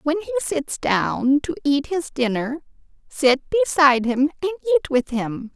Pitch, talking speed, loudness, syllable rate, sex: 295 Hz, 160 wpm, -21 LUFS, 4.6 syllables/s, female